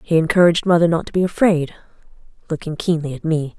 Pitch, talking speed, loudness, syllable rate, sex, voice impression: 165 Hz, 185 wpm, -18 LUFS, 6.5 syllables/s, female, feminine, slightly adult-like, calm, elegant